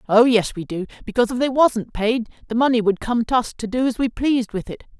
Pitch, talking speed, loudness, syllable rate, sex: 235 Hz, 265 wpm, -20 LUFS, 6.2 syllables/s, female